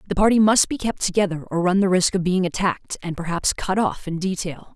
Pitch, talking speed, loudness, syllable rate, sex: 185 Hz, 240 wpm, -21 LUFS, 5.8 syllables/s, female